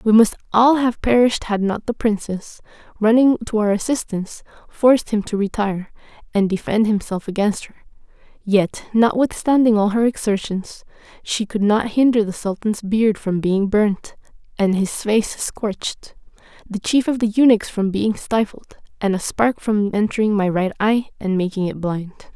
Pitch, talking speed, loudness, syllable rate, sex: 210 Hz, 165 wpm, -19 LUFS, 4.8 syllables/s, female